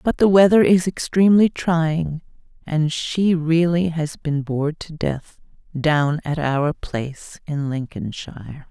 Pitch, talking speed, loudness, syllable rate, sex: 160 Hz, 140 wpm, -20 LUFS, 3.9 syllables/s, female